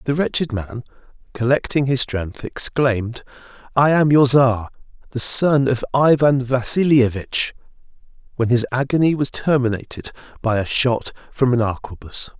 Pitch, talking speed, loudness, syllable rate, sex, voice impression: 125 Hz, 130 wpm, -18 LUFS, 4.6 syllables/s, male, masculine, adult-like, clear, fluent, raspy, sincere, slightly friendly, reassuring, slightly wild, kind, slightly modest